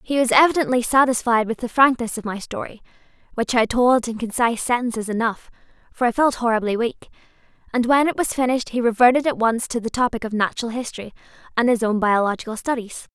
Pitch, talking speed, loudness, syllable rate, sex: 235 Hz, 190 wpm, -20 LUFS, 6.4 syllables/s, female